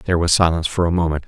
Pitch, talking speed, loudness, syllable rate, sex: 85 Hz, 280 wpm, -18 LUFS, 8.1 syllables/s, male